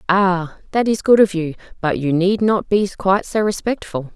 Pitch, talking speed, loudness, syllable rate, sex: 190 Hz, 200 wpm, -18 LUFS, 4.9 syllables/s, female